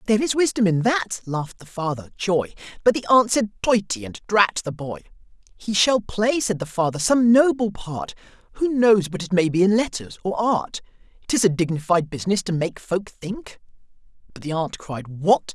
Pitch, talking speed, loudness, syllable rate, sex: 195 Hz, 195 wpm, -21 LUFS, 5.0 syllables/s, male